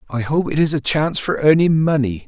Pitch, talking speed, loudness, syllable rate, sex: 145 Hz, 235 wpm, -17 LUFS, 5.9 syllables/s, male